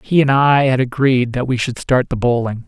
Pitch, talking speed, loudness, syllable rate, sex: 130 Hz, 245 wpm, -16 LUFS, 5.1 syllables/s, male